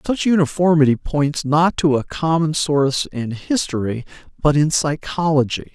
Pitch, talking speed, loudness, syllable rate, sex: 150 Hz, 135 wpm, -18 LUFS, 4.6 syllables/s, male